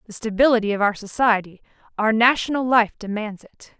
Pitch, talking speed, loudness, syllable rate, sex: 220 Hz, 140 wpm, -20 LUFS, 5.5 syllables/s, female